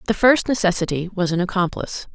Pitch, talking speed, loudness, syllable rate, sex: 195 Hz, 170 wpm, -20 LUFS, 6.4 syllables/s, female